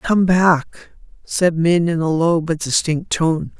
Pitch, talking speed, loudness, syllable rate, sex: 165 Hz, 165 wpm, -17 LUFS, 3.7 syllables/s, female